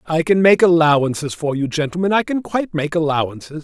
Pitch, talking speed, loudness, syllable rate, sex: 165 Hz, 200 wpm, -17 LUFS, 5.9 syllables/s, male